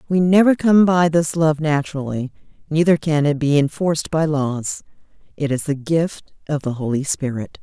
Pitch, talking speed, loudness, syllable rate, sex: 150 Hz, 175 wpm, -19 LUFS, 4.9 syllables/s, female